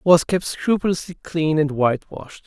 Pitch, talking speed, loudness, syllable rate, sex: 160 Hz, 170 wpm, -20 LUFS, 5.4 syllables/s, male